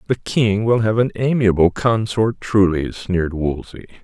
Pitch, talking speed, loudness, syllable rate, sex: 105 Hz, 150 wpm, -18 LUFS, 4.4 syllables/s, male